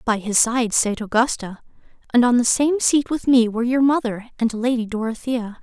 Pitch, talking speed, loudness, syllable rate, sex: 240 Hz, 190 wpm, -19 LUFS, 5.1 syllables/s, female